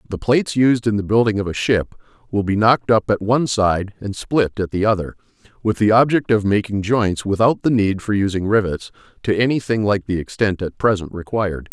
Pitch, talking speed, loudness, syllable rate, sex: 105 Hz, 210 wpm, -18 LUFS, 5.5 syllables/s, male